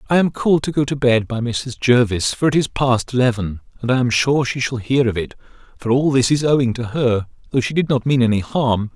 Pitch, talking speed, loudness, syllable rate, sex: 125 Hz, 255 wpm, -18 LUFS, 5.6 syllables/s, male